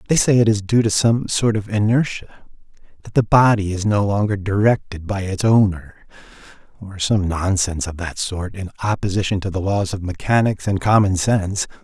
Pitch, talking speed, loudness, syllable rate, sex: 100 Hz, 185 wpm, -19 LUFS, 5.2 syllables/s, male